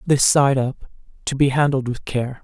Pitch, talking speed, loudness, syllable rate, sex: 135 Hz, 195 wpm, -19 LUFS, 4.6 syllables/s, female